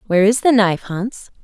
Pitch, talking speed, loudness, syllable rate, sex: 210 Hz, 210 wpm, -16 LUFS, 5.9 syllables/s, female